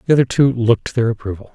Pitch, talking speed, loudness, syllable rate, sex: 120 Hz, 230 wpm, -17 LUFS, 7.2 syllables/s, male